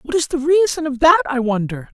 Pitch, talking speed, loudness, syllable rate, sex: 255 Hz, 240 wpm, -17 LUFS, 5.2 syllables/s, female